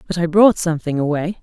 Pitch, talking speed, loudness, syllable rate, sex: 170 Hz, 210 wpm, -16 LUFS, 6.5 syllables/s, female